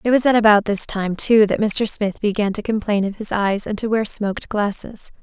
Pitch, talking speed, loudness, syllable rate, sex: 210 Hz, 240 wpm, -19 LUFS, 5.2 syllables/s, female